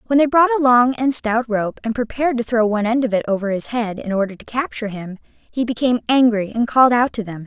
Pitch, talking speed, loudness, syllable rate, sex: 235 Hz, 255 wpm, -18 LUFS, 6.3 syllables/s, female